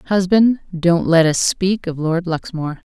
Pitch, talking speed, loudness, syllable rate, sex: 175 Hz, 165 wpm, -17 LUFS, 4.1 syllables/s, female